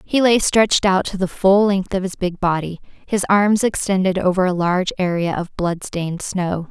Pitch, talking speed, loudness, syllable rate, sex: 185 Hz, 205 wpm, -18 LUFS, 5.0 syllables/s, female